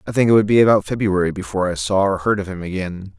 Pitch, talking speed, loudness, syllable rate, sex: 95 Hz, 285 wpm, -18 LUFS, 6.9 syllables/s, male